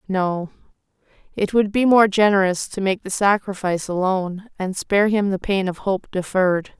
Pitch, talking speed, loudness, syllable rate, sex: 195 Hz, 170 wpm, -20 LUFS, 5.1 syllables/s, female